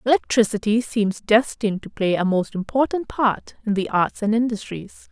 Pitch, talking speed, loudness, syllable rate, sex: 220 Hz, 165 wpm, -21 LUFS, 4.9 syllables/s, female